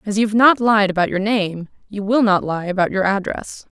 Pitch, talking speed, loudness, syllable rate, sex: 205 Hz, 235 wpm, -17 LUFS, 5.3 syllables/s, female